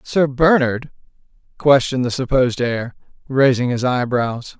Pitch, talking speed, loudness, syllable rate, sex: 130 Hz, 120 wpm, -17 LUFS, 4.6 syllables/s, male